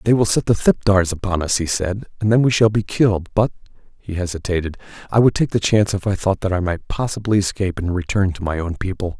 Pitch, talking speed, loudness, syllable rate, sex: 95 Hz, 235 wpm, -19 LUFS, 6.3 syllables/s, male